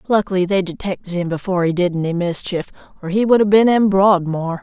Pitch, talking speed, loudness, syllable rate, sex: 185 Hz, 210 wpm, -17 LUFS, 6.0 syllables/s, female